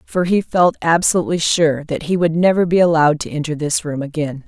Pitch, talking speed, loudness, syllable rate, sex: 160 Hz, 215 wpm, -16 LUFS, 5.8 syllables/s, female